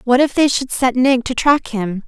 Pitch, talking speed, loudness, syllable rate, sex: 255 Hz, 260 wpm, -16 LUFS, 4.6 syllables/s, female